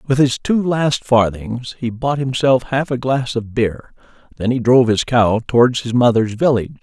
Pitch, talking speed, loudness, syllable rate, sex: 125 Hz, 195 wpm, -16 LUFS, 4.8 syllables/s, male